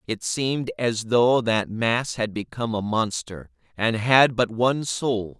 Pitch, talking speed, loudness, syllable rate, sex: 115 Hz, 165 wpm, -23 LUFS, 4.1 syllables/s, male